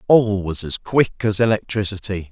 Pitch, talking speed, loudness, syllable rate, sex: 105 Hz, 155 wpm, -20 LUFS, 4.9 syllables/s, male